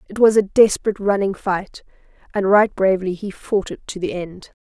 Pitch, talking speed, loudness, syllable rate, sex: 195 Hz, 195 wpm, -19 LUFS, 5.6 syllables/s, female